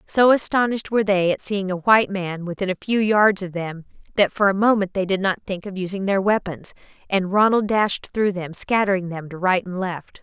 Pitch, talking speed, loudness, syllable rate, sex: 195 Hz, 225 wpm, -21 LUFS, 5.4 syllables/s, female